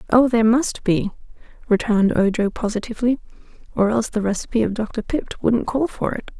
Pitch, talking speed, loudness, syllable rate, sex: 225 Hz, 170 wpm, -20 LUFS, 5.9 syllables/s, female